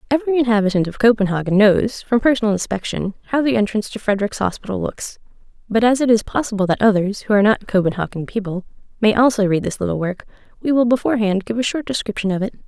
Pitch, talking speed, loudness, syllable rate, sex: 215 Hz, 200 wpm, -18 LUFS, 6.8 syllables/s, female